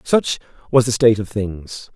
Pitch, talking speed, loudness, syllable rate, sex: 110 Hz, 185 wpm, -18 LUFS, 4.6 syllables/s, male